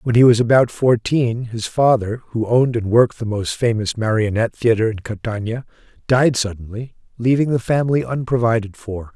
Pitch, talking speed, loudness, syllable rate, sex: 115 Hz, 165 wpm, -18 LUFS, 5.3 syllables/s, male